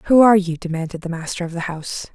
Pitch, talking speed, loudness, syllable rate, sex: 180 Hz, 250 wpm, -20 LUFS, 6.8 syllables/s, female